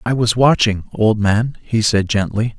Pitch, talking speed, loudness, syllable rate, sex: 110 Hz, 185 wpm, -16 LUFS, 4.2 syllables/s, male